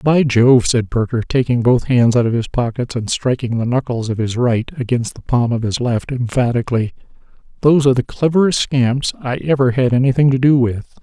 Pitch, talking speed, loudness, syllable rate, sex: 125 Hz, 200 wpm, -16 LUFS, 5.4 syllables/s, male